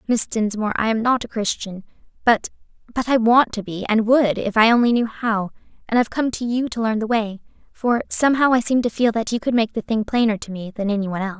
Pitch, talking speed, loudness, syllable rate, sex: 225 Hz, 250 wpm, -20 LUFS, 6.2 syllables/s, female